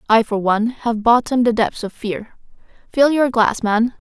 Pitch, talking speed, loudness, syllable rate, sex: 230 Hz, 190 wpm, -17 LUFS, 4.8 syllables/s, female